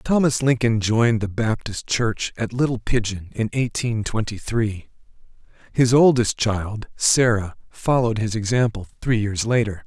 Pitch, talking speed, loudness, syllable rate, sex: 115 Hz, 140 wpm, -21 LUFS, 4.5 syllables/s, male